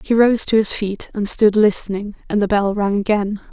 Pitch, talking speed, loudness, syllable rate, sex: 205 Hz, 220 wpm, -17 LUFS, 5.1 syllables/s, female